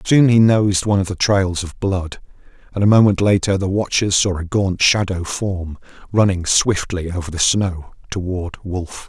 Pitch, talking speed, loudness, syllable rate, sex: 95 Hz, 180 wpm, -17 LUFS, 4.6 syllables/s, male